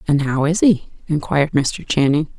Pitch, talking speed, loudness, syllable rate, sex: 155 Hz, 175 wpm, -18 LUFS, 4.9 syllables/s, female